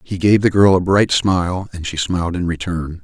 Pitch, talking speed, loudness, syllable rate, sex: 90 Hz, 235 wpm, -17 LUFS, 5.2 syllables/s, male